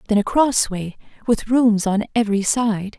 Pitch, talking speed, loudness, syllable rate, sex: 215 Hz, 160 wpm, -19 LUFS, 4.6 syllables/s, female